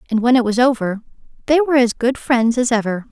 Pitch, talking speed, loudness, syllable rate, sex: 240 Hz, 230 wpm, -16 LUFS, 6.1 syllables/s, female